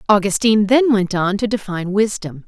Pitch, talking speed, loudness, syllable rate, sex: 205 Hz, 170 wpm, -17 LUFS, 5.7 syllables/s, female